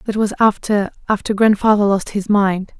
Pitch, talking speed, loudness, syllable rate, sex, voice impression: 205 Hz, 150 wpm, -16 LUFS, 5.0 syllables/s, female, feminine, adult-like, slightly cute, calm, friendly